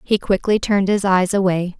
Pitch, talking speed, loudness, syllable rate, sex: 195 Hz, 200 wpm, -17 LUFS, 5.3 syllables/s, female